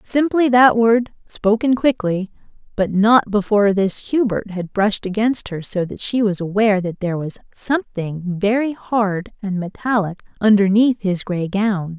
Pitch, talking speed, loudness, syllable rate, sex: 210 Hz, 155 wpm, -18 LUFS, 4.5 syllables/s, female